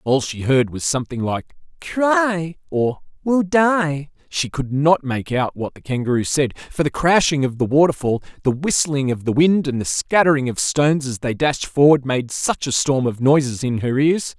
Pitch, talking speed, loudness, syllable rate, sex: 145 Hz, 200 wpm, -19 LUFS, 4.7 syllables/s, male